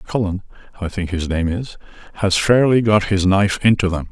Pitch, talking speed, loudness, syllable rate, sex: 100 Hz, 175 wpm, -17 LUFS, 5.3 syllables/s, male